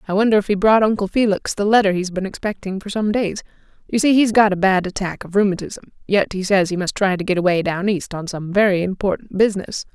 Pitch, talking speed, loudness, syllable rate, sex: 195 Hz, 240 wpm, -18 LUFS, 6.1 syllables/s, female